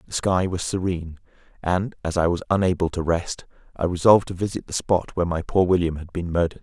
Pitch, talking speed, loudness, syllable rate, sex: 90 Hz, 215 wpm, -23 LUFS, 6.2 syllables/s, male